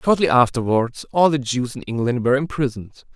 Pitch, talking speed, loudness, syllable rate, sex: 130 Hz, 170 wpm, -20 LUFS, 5.8 syllables/s, male